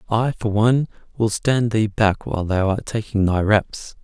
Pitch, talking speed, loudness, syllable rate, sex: 105 Hz, 195 wpm, -20 LUFS, 4.7 syllables/s, male